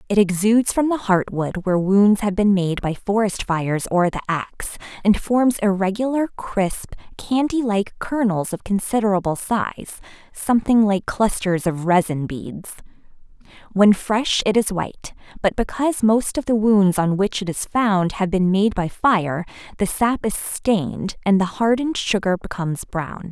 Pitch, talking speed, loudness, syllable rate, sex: 200 Hz, 165 wpm, -20 LUFS, 4.7 syllables/s, female